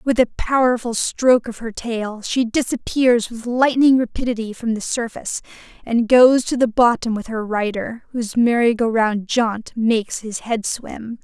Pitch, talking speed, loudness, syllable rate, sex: 230 Hz, 170 wpm, -19 LUFS, 4.5 syllables/s, female